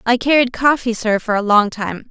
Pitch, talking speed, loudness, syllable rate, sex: 230 Hz, 230 wpm, -16 LUFS, 5.0 syllables/s, female